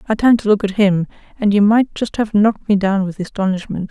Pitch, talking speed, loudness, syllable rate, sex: 205 Hz, 245 wpm, -16 LUFS, 6.1 syllables/s, female